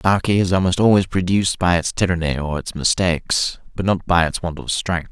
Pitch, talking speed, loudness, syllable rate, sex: 90 Hz, 210 wpm, -19 LUFS, 5.8 syllables/s, male